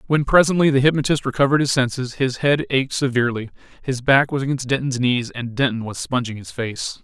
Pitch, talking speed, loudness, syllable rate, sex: 130 Hz, 195 wpm, -19 LUFS, 5.8 syllables/s, male